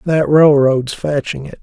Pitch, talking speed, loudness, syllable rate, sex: 145 Hz, 145 wpm, -13 LUFS, 3.9 syllables/s, male